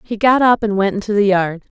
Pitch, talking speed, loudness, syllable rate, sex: 210 Hz, 270 wpm, -15 LUFS, 5.7 syllables/s, female